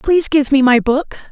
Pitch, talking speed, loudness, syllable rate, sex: 280 Hz, 230 wpm, -13 LUFS, 5.2 syllables/s, female